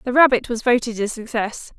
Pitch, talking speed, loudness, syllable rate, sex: 235 Hz, 200 wpm, -19 LUFS, 6.2 syllables/s, female